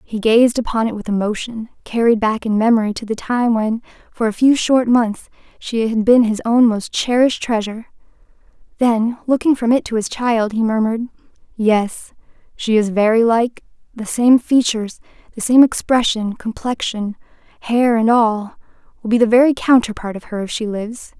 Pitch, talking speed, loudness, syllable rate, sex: 225 Hz, 165 wpm, -17 LUFS, 5.0 syllables/s, female